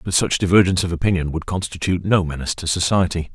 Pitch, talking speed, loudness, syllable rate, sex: 90 Hz, 195 wpm, -19 LUFS, 7.1 syllables/s, male